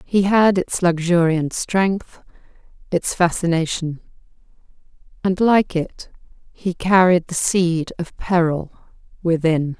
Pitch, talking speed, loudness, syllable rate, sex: 175 Hz, 105 wpm, -19 LUFS, 3.6 syllables/s, female